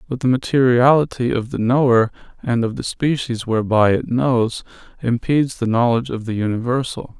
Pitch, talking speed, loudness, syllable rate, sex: 120 Hz, 160 wpm, -18 LUFS, 5.4 syllables/s, male